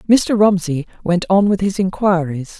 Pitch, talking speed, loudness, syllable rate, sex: 185 Hz, 160 wpm, -16 LUFS, 4.5 syllables/s, female